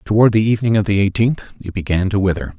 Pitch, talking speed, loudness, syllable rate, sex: 105 Hz, 230 wpm, -17 LUFS, 6.6 syllables/s, male